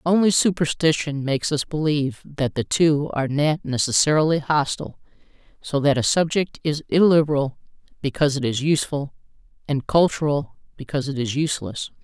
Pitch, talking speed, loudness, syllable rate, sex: 150 Hz, 135 wpm, -21 LUFS, 5.6 syllables/s, female